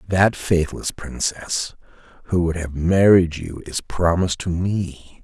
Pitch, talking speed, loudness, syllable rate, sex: 85 Hz, 140 wpm, -21 LUFS, 3.8 syllables/s, male